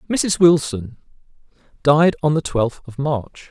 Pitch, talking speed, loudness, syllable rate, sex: 145 Hz, 135 wpm, -18 LUFS, 3.8 syllables/s, male